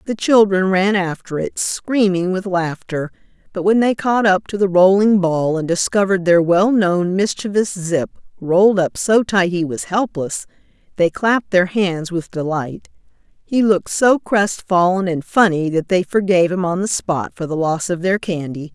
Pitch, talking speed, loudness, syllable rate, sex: 185 Hz, 175 wpm, -17 LUFS, 4.6 syllables/s, female